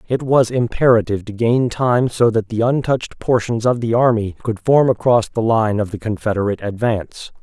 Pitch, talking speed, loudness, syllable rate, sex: 115 Hz, 185 wpm, -17 LUFS, 5.3 syllables/s, male